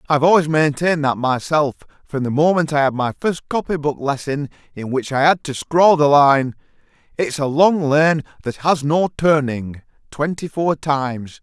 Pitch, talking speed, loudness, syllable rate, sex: 145 Hz, 180 wpm, -18 LUFS, 4.7 syllables/s, male